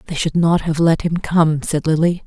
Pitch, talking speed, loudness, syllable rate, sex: 160 Hz, 240 wpm, -17 LUFS, 4.4 syllables/s, female